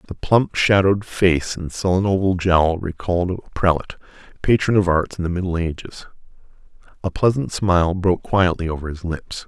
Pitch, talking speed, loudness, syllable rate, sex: 90 Hz, 165 wpm, -20 LUFS, 5.6 syllables/s, male